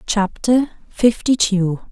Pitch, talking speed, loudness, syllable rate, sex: 215 Hz, 95 wpm, -17 LUFS, 3.4 syllables/s, female